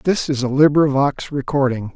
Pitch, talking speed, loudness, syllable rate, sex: 140 Hz, 155 wpm, -17 LUFS, 4.7 syllables/s, male